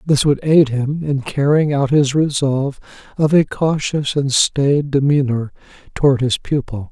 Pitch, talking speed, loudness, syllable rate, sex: 140 Hz, 155 wpm, -16 LUFS, 4.3 syllables/s, male